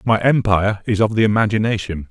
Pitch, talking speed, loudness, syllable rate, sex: 105 Hz, 170 wpm, -17 LUFS, 6.1 syllables/s, male